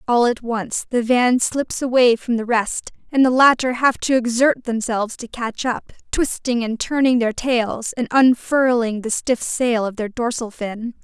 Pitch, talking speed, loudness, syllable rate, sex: 240 Hz, 185 wpm, -19 LUFS, 4.2 syllables/s, female